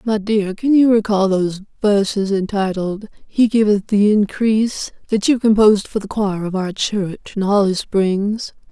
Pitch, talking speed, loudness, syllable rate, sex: 205 Hz, 165 wpm, -17 LUFS, 4.5 syllables/s, female